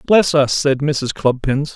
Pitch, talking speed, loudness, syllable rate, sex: 145 Hz, 170 wpm, -16 LUFS, 3.7 syllables/s, male